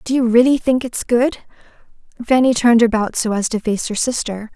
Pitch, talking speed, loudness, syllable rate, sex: 235 Hz, 200 wpm, -16 LUFS, 5.5 syllables/s, female